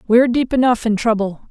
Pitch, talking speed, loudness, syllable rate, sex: 230 Hz, 200 wpm, -16 LUFS, 6.3 syllables/s, female